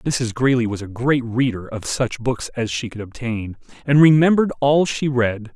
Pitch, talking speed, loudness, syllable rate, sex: 125 Hz, 195 wpm, -19 LUFS, 4.7 syllables/s, male